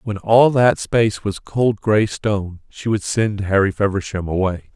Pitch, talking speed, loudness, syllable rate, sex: 105 Hz, 175 wpm, -18 LUFS, 4.4 syllables/s, male